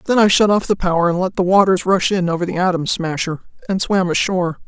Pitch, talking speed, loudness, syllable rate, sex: 180 Hz, 245 wpm, -17 LUFS, 6.2 syllables/s, female